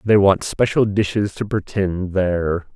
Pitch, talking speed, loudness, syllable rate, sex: 95 Hz, 155 wpm, -19 LUFS, 4.3 syllables/s, male